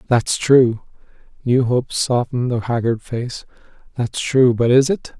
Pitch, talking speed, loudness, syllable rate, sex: 125 Hz, 115 wpm, -18 LUFS, 4.5 syllables/s, male